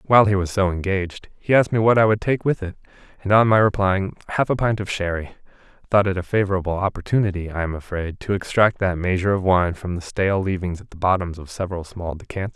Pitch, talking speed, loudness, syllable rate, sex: 95 Hz, 225 wpm, -21 LUFS, 6.5 syllables/s, male